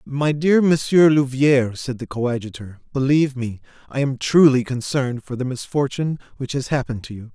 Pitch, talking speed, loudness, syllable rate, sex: 135 Hz, 170 wpm, -20 LUFS, 5.6 syllables/s, male